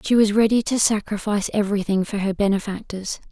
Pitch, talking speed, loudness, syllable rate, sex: 205 Hz, 165 wpm, -21 LUFS, 6.1 syllables/s, female